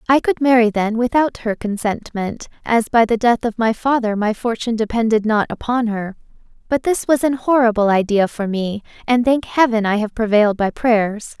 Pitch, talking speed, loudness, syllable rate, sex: 225 Hz, 190 wpm, -17 LUFS, 5.1 syllables/s, female